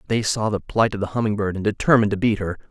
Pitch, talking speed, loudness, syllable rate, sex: 105 Hz, 290 wpm, -21 LUFS, 7.1 syllables/s, male